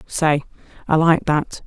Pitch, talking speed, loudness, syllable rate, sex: 155 Hz, 145 wpm, -19 LUFS, 3.6 syllables/s, female